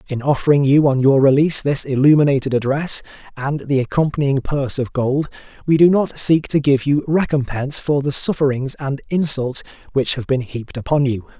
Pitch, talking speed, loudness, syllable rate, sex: 140 Hz, 180 wpm, -17 LUFS, 5.5 syllables/s, male